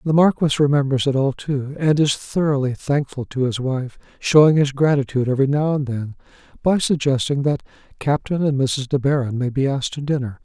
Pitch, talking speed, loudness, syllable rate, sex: 140 Hz, 190 wpm, -20 LUFS, 5.6 syllables/s, male